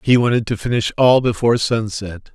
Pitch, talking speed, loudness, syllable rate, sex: 110 Hz, 180 wpm, -17 LUFS, 5.5 syllables/s, male